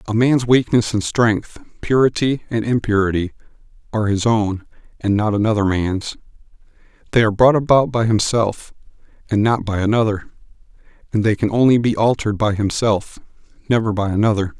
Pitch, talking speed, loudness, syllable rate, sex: 110 Hz, 150 wpm, -18 LUFS, 5.5 syllables/s, male